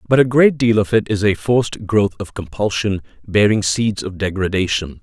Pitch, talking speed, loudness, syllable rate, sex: 100 Hz, 190 wpm, -17 LUFS, 5.0 syllables/s, male